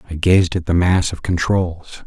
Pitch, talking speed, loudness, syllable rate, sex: 85 Hz, 205 wpm, -17 LUFS, 4.3 syllables/s, male